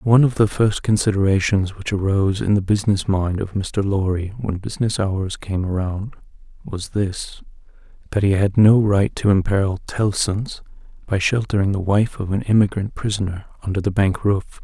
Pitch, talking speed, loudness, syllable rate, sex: 100 Hz, 165 wpm, -20 LUFS, 5.0 syllables/s, male